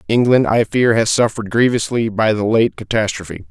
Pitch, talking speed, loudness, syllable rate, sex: 110 Hz, 170 wpm, -16 LUFS, 5.5 syllables/s, male